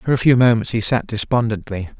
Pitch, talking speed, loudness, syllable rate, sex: 115 Hz, 210 wpm, -17 LUFS, 5.9 syllables/s, male